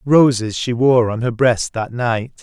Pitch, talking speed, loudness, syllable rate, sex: 120 Hz, 200 wpm, -17 LUFS, 3.9 syllables/s, male